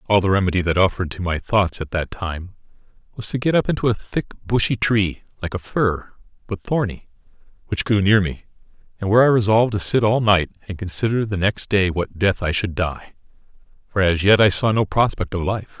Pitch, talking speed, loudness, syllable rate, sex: 100 Hz, 215 wpm, -20 LUFS, 5.6 syllables/s, male